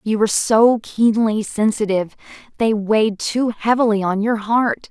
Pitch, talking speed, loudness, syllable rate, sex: 220 Hz, 135 wpm, -17 LUFS, 4.6 syllables/s, female